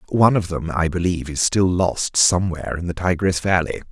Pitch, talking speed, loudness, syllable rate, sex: 90 Hz, 200 wpm, -19 LUFS, 5.8 syllables/s, male